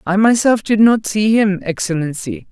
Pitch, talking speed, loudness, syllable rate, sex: 205 Hz, 165 wpm, -15 LUFS, 4.7 syllables/s, female